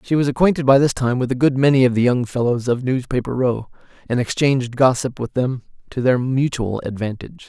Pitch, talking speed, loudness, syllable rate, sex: 125 Hz, 210 wpm, -19 LUFS, 5.8 syllables/s, male